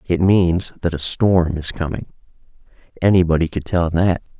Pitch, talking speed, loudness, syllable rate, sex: 85 Hz, 150 wpm, -18 LUFS, 4.8 syllables/s, male